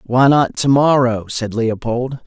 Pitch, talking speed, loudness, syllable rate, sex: 125 Hz, 160 wpm, -16 LUFS, 3.7 syllables/s, male